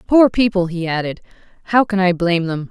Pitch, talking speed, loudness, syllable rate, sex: 185 Hz, 200 wpm, -17 LUFS, 5.9 syllables/s, female